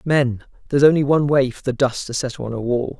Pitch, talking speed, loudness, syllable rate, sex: 130 Hz, 240 wpm, -19 LUFS, 6.4 syllables/s, male